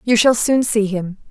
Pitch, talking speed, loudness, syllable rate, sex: 220 Hz, 230 wpm, -16 LUFS, 4.5 syllables/s, female